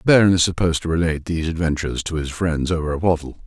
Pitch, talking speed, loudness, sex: 85 Hz, 245 wpm, -20 LUFS, male